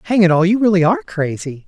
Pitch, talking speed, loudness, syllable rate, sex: 175 Hz, 250 wpm, -15 LUFS, 6.7 syllables/s, male